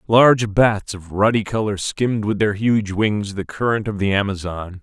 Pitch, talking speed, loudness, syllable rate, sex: 105 Hz, 185 wpm, -19 LUFS, 4.7 syllables/s, male